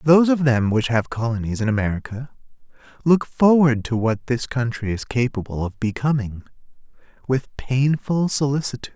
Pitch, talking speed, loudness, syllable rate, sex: 125 Hz, 140 wpm, -21 LUFS, 5.1 syllables/s, male